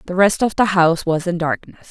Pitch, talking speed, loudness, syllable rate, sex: 180 Hz, 250 wpm, -17 LUFS, 5.8 syllables/s, female